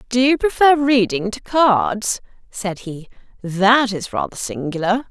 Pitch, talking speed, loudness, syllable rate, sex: 225 Hz, 140 wpm, -18 LUFS, 4.0 syllables/s, female